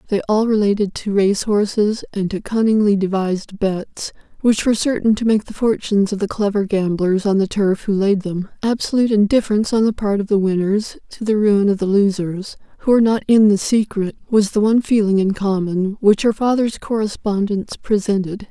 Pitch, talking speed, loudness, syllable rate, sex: 205 Hz, 190 wpm, -17 LUFS, 5.4 syllables/s, female